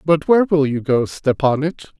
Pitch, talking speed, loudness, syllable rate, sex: 150 Hz, 180 wpm, -17 LUFS, 5.1 syllables/s, male